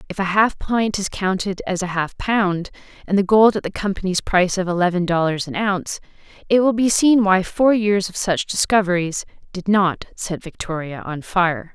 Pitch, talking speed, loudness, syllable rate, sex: 190 Hz, 195 wpm, -19 LUFS, 5.0 syllables/s, female